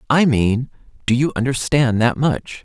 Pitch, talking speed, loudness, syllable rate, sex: 125 Hz, 160 wpm, -18 LUFS, 4.4 syllables/s, male